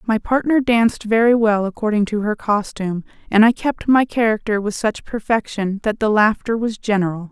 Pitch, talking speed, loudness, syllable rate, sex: 215 Hz, 180 wpm, -18 LUFS, 5.2 syllables/s, female